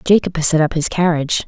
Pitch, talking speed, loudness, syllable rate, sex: 165 Hz, 245 wpm, -16 LUFS, 6.8 syllables/s, female